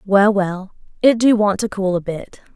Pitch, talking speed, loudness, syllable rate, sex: 200 Hz, 210 wpm, -17 LUFS, 4.5 syllables/s, female